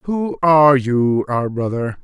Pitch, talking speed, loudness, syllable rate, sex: 135 Hz, 145 wpm, -16 LUFS, 3.9 syllables/s, male